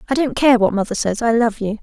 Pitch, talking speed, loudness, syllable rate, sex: 225 Hz, 295 wpm, -17 LUFS, 6.2 syllables/s, female